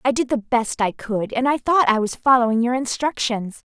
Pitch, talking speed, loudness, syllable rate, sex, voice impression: 240 Hz, 220 wpm, -20 LUFS, 5.1 syllables/s, female, feminine, slightly adult-like, clear, slightly fluent, cute, slightly refreshing, friendly